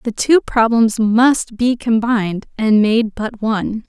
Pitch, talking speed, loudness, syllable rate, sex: 225 Hz, 155 wpm, -15 LUFS, 3.9 syllables/s, female